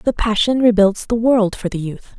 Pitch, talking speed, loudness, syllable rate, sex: 215 Hz, 220 wpm, -16 LUFS, 4.8 syllables/s, female